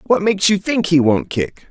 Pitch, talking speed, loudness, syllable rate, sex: 180 Hz, 245 wpm, -16 LUFS, 5.0 syllables/s, male